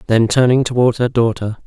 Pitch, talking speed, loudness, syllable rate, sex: 120 Hz, 180 wpm, -15 LUFS, 5.6 syllables/s, male